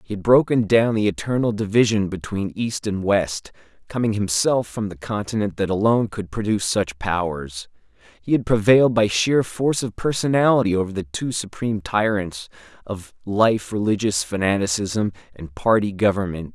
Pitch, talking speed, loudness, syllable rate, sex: 105 Hz, 150 wpm, -21 LUFS, 5.1 syllables/s, male